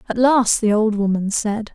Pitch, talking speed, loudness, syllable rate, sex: 220 Hz, 205 wpm, -18 LUFS, 4.5 syllables/s, female